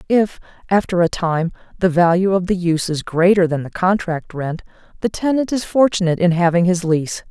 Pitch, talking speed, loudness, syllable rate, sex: 180 Hz, 190 wpm, -18 LUFS, 5.6 syllables/s, female